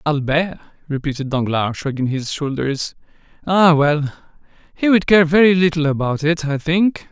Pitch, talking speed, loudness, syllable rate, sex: 155 Hz, 145 wpm, -17 LUFS, 4.8 syllables/s, male